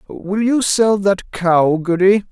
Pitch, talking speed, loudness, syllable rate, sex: 195 Hz, 155 wpm, -16 LUFS, 3.4 syllables/s, male